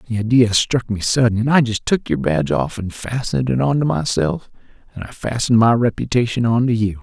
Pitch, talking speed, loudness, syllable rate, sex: 110 Hz, 205 wpm, -18 LUFS, 5.8 syllables/s, male